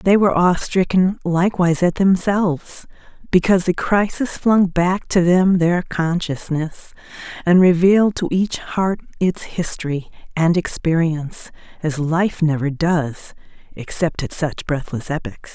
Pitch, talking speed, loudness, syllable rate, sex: 170 Hz, 130 wpm, -18 LUFS, 4.4 syllables/s, female